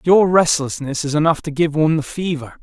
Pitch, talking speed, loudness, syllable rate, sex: 155 Hz, 205 wpm, -17 LUFS, 5.5 syllables/s, male